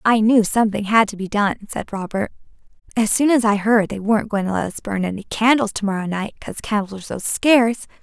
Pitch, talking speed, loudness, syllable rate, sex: 210 Hz, 230 wpm, -19 LUFS, 6.0 syllables/s, female